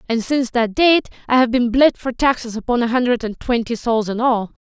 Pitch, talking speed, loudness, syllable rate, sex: 240 Hz, 235 wpm, -18 LUFS, 5.5 syllables/s, female